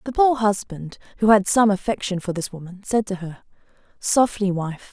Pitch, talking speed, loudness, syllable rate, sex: 200 Hz, 185 wpm, -21 LUFS, 5.0 syllables/s, female